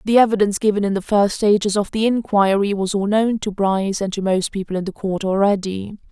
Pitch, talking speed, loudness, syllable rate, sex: 200 Hz, 225 wpm, -19 LUFS, 5.9 syllables/s, female